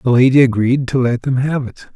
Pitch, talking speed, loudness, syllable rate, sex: 130 Hz, 245 wpm, -15 LUFS, 5.7 syllables/s, male